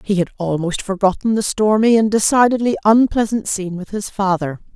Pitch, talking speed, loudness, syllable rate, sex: 205 Hz, 165 wpm, -17 LUFS, 5.5 syllables/s, female